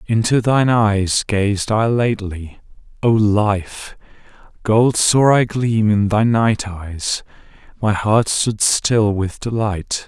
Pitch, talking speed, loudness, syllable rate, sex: 105 Hz, 125 wpm, -17 LUFS, 3.3 syllables/s, male